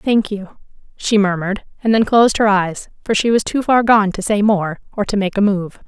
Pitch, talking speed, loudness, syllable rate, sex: 205 Hz, 235 wpm, -16 LUFS, 5.2 syllables/s, female